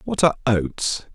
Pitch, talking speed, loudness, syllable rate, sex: 130 Hz, 155 wpm, -21 LUFS, 4.6 syllables/s, male